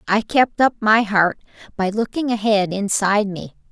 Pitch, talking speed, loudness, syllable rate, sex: 210 Hz, 160 wpm, -18 LUFS, 4.7 syllables/s, female